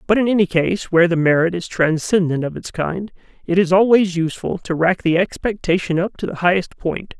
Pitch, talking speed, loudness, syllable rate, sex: 180 Hz, 210 wpm, -18 LUFS, 5.5 syllables/s, male